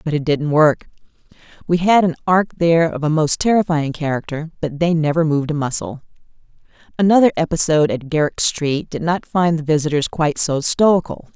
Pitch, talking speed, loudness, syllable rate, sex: 160 Hz, 175 wpm, -17 LUFS, 5.4 syllables/s, female